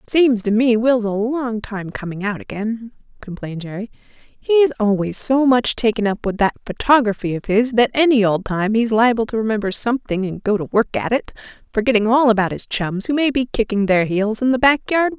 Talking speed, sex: 220 wpm, female